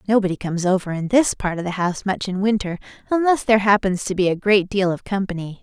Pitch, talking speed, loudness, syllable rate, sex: 195 Hz, 235 wpm, -20 LUFS, 6.4 syllables/s, female